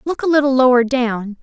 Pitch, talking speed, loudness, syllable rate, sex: 255 Hz, 210 wpm, -15 LUFS, 5.3 syllables/s, female